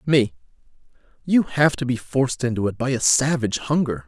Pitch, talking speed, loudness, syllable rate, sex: 125 Hz, 175 wpm, -21 LUFS, 5.6 syllables/s, male